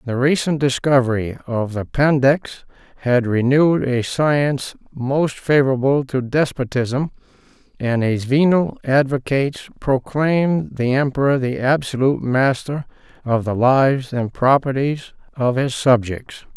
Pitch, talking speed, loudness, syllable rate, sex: 135 Hz, 115 wpm, -18 LUFS, 4.3 syllables/s, male